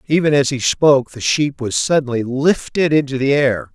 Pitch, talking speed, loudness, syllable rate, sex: 135 Hz, 190 wpm, -16 LUFS, 5.0 syllables/s, male